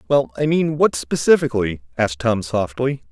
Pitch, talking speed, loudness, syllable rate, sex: 120 Hz, 115 wpm, -19 LUFS, 5.3 syllables/s, male